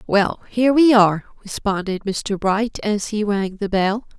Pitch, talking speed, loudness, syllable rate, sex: 210 Hz, 170 wpm, -19 LUFS, 4.3 syllables/s, female